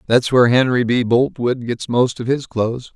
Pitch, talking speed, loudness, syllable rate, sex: 120 Hz, 205 wpm, -17 LUFS, 5.1 syllables/s, male